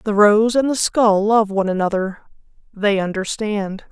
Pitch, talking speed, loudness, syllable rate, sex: 205 Hz, 155 wpm, -18 LUFS, 4.6 syllables/s, female